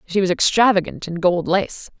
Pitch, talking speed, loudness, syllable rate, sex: 185 Hz, 180 wpm, -18 LUFS, 5.0 syllables/s, female